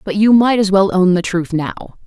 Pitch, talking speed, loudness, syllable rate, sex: 190 Hz, 260 wpm, -14 LUFS, 5.4 syllables/s, female